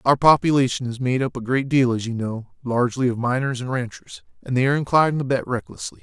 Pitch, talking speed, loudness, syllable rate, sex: 130 Hz, 230 wpm, -21 LUFS, 6.2 syllables/s, male